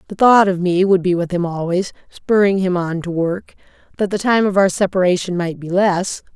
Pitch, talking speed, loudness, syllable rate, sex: 185 Hz, 215 wpm, -17 LUFS, 5.1 syllables/s, female